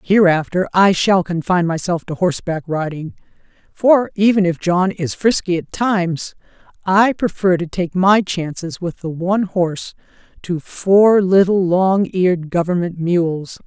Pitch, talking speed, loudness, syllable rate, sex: 180 Hz, 140 wpm, -17 LUFS, 4.4 syllables/s, female